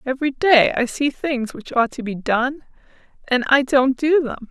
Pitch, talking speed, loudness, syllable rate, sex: 265 Hz, 200 wpm, -19 LUFS, 4.5 syllables/s, female